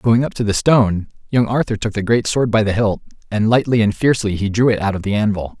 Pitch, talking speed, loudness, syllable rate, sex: 110 Hz, 270 wpm, -17 LUFS, 6.2 syllables/s, male